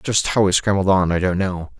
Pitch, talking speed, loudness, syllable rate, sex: 95 Hz, 270 wpm, -18 LUFS, 5.2 syllables/s, male